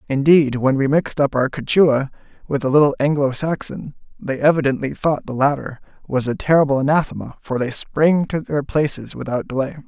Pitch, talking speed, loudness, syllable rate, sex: 140 Hz, 175 wpm, -19 LUFS, 5.4 syllables/s, male